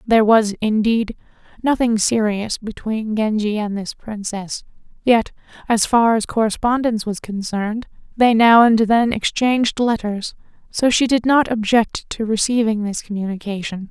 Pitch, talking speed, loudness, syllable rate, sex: 220 Hz, 140 wpm, -18 LUFS, 4.6 syllables/s, female